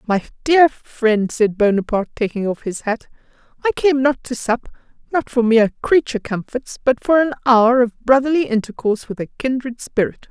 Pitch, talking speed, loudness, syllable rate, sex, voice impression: 245 Hz, 175 wpm, -18 LUFS, 5.3 syllables/s, female, feminine, adult-like, slightly muffled, slightly unique